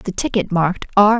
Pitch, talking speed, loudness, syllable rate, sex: 195 Hz, 200 wpm, -17 LUFS, 5.4 syllables/s, female